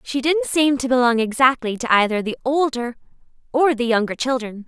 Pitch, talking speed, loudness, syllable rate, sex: 250 Hz, 180 wpm, -19 LUFS, 5.3 syllables/s, female